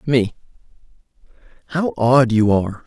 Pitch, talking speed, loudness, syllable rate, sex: 120 Hz, 105 wpm, -17 LUFS, 4.6 syllables/s, male